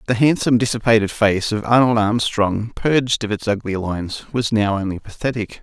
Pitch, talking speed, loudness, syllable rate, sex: 110 Hz, 170 wpm, -19 LUFS, 5.4 syllables/s, male